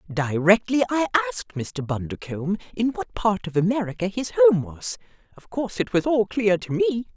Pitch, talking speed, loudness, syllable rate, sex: 195 Hz, 175 wpm, -23 LUFS, 5.2 syllables/s, female